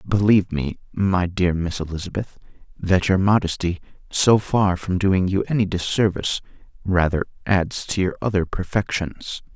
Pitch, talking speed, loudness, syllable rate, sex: 95 Hz, 140 wpm, -21 LUFS, 4.8 syllables/s, male